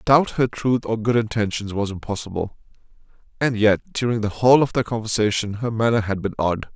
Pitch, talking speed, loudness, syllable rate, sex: 110 Hz, 195 wpm, -21 LUFS, 5.9 syllables/s, male